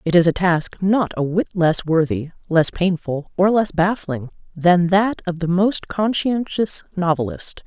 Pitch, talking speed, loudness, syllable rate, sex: 175 Hz, 165 wpm, -19 LUFS, 4.1 syllables/s, female